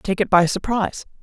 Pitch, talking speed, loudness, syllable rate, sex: 195 Hz, 195 wpm, -19 LUFS, 5.8 syllables/s, female